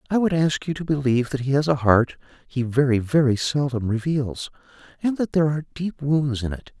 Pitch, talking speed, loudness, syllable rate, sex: 140 Hz, 210 wpm, -22 LUFS, 5.7 syllables/s, male